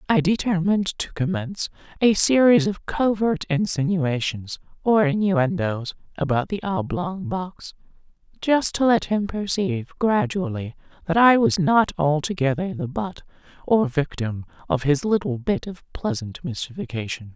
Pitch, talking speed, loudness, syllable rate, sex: 185 Hz, 125 wpm, -22 LUFS, 4.4 syllables/s, female